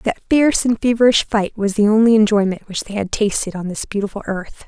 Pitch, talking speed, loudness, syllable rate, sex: 210 Hz, 220 wpm, -17 LUFS, 5.9 syllables/s, female